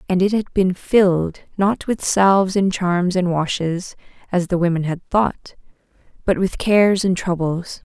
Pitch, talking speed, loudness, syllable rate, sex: 185 Hz, 165 wpm, -19 LUFS, 4.4 syllables/s, female